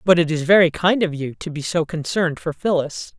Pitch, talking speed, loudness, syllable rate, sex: 165 Hz, 245 wpm, -20 LUFS, 5.6 syllables/s, female